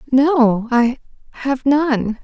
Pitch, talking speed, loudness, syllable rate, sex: 260 Hz, 105 wpm, -16 LUFS, 2.7 syllables/s, female